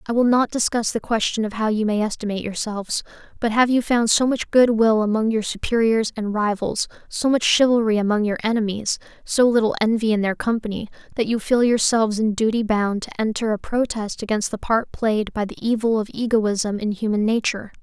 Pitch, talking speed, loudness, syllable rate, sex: 220 Hz, 200 wpm, -21 LUFS, 5.6 syllables/s, female